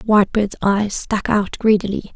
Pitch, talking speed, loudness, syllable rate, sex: 205 Hz, 140 wpm, -18 LUFS, 4.4 syllables/s, female